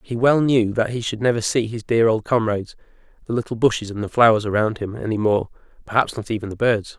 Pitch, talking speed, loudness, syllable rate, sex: 115 Hz, 215 wpm, -20 LUFS, 6.1 syllables/s, male